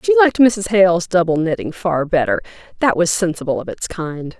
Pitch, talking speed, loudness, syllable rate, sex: 185 Hz, 190 wpm, -17 LUFS, 5.5 syllables/s, female